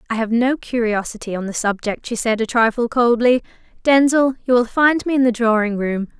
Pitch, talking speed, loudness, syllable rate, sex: 235 Hz, 205 wpm, -18 LUFS, 5.3 syllables/s, female